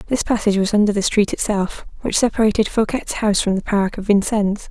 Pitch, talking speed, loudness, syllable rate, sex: 210 Hz, 205 wpm, -18 LUFS, 6.2 syllables/s, female